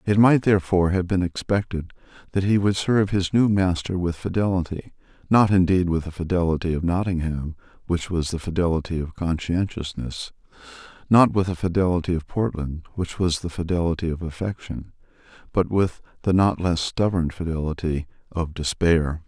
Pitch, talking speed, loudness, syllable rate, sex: 90 Hz, 155 wpm, -23 LUFS, 5.4 syllables/s, male